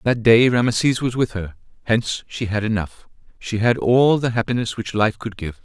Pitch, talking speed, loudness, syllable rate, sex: 115 Hz, 200 wpm, -19 LUFS, 5.1 syllables/s, male